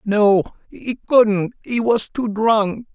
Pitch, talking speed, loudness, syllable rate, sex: 215 Hz, 140 wpm, -18 LUFS, 3.0 syllables/s, male